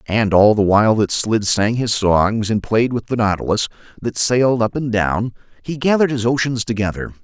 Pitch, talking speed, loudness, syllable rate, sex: 110 Hz, 200 wpm, -17 LUFS, 5.2 syllables/s, male